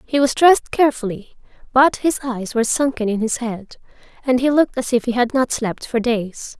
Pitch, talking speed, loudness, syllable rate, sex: 245 Hz, 210 wpm, -18 LUFS, 5.4 syllables/s, female